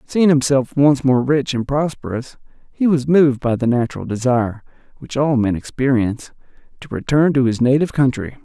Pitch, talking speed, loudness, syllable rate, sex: 135 Hz, 170 wpm, -17 LUFS, 5.5 syllables/s, male